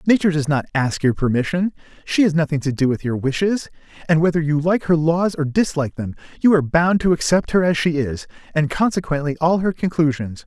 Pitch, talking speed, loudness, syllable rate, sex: 160 Hz, 210 wpm, -19 LUFS, 5.9 syllables/s, male